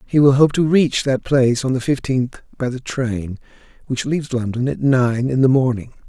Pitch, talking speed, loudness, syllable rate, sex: 130 Hz, 205 wpm, -18 LUFS, 5.0 syllables/s, male